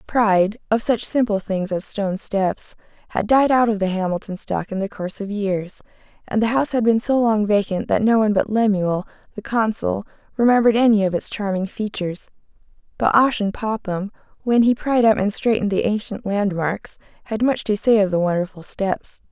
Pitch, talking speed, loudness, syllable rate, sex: 210 Hz, 190 wpm, -20 LUFS, 5.0 syllables/s, female